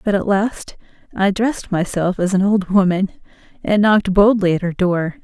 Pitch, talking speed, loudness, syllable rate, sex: 195 Hz, 185 wpm, -17 LUFS, 5.0 syllables/s, female